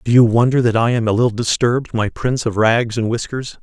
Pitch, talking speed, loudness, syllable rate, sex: 115 Hz, 250 wpm, -16 LUFS, 6.0 syllables/s, male